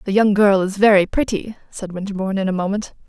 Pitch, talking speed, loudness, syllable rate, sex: 200 Hz, 215 wpm, -18 LUFS, 6.2 syllables/s, female